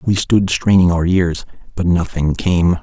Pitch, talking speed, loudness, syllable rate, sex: 90 Hz, 170 wpm, -15 LUFS, 4.0 syllables/s, male